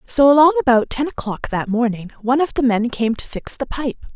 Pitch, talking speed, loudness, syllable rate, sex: 250 Hz, 230 wpm, -18 LUFS, 5.7 syllables/s, female